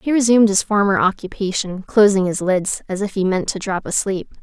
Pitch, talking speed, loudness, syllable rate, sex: 200 Hz, 205 wpm, -18 LUFS, 5.5 syllables/s, female